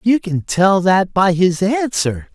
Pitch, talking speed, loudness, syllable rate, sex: 190 Hz, 180 wpm, -16 LUFS, 3.6 syllables/s, male